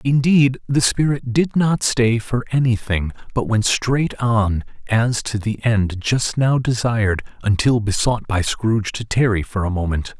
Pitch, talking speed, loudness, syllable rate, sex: 115 Hz, 165 wpm, -19 LUFS, 4.2 syllables/s, male